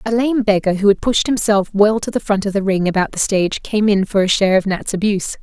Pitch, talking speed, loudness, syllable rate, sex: 205 Hz, 275 wpm, -16 LUFS, 6.1 syllables/s, female